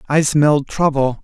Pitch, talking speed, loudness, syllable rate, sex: 145 Hz, 145 wpm, -16 LUFS, 3.9 syllables/s, male